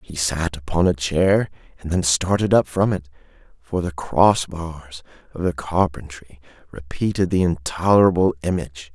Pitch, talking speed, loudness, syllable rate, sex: 85 Hz, 150 wpm, -20 LUFS, 4.6 syllables/s, male